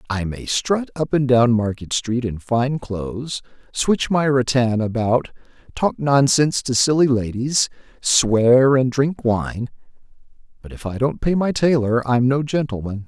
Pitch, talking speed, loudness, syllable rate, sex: 125 Hz, 155 wpm, -19 LUFS, 4.2 syllables/s, male